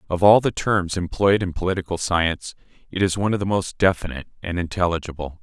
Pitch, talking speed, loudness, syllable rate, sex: 90 Hz, 190 wpm, -21 LUFS, 6.3 syllables/s, male